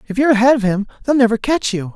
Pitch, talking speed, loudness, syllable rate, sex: 230 Hz, 275 wpm, -16 LUFS, 7.5 syllables/s, male